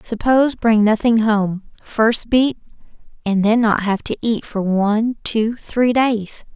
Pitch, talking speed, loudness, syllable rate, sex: 220 Hz, 155 wpm, -17 LUFS, 3.9 syllables/s, female